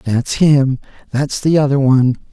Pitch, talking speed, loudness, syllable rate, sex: 135 Hz, 130 wpm, -14 LUFS, 4.5 syllables/s, male